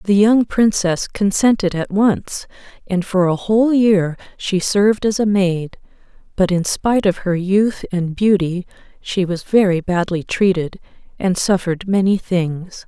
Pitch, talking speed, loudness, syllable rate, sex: 190 Hz, 155 wpm, -17 LUFS, 4.2 syllables/s, female